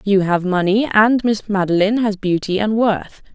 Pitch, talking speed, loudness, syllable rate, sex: 205 Hz, 180 wpm, -17 LUFS, 4.8 syllables/s, female